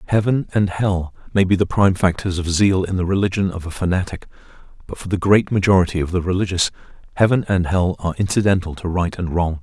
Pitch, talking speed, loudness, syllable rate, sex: 95 Hz, 205 wpm, -19 LUFS, 6.2 syllables/s, male